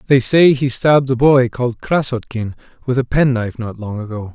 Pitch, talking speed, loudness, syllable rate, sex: 125 Hz, 205 wpm, -16 LUFS, 5.4 syllables/s, male